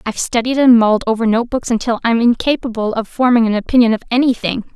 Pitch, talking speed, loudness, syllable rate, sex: 235 Hz, 190 wpm, -15 LUFS, 6.7 syllables/s, female